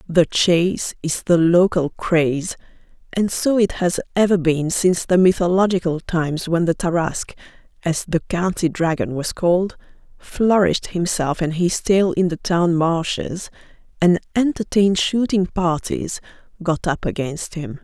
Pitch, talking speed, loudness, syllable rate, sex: 175 Hz, 140 wpm, -19 LUFS, 4.5 syllables/s, female